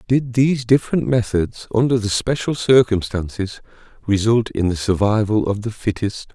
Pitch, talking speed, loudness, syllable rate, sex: 110 Hz, 140 wpm, -19 LUFS, 5.0 syllables/s, male